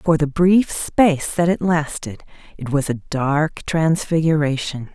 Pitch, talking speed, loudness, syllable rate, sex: 155 Hz, 145 wpm, -19 LUFS, 4.0 syllables/s, female